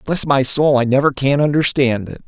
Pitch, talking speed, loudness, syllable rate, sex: 135 Hz, 210 wpm, -15 LUFS, 5.1 syllables/s, male